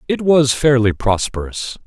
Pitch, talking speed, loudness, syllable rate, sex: 125 Hz, 130 wpm, -16 LUFS, 4.3 syllables/s, male